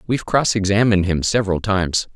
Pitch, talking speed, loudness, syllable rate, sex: 100 Hz, 165 wpm, -18 LUFS, 6.6 syllables/s, male